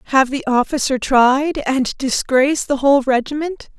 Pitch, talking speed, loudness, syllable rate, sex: 270 Hz, 145 wpm, -17 LUFS, 4.7 syllables/s, female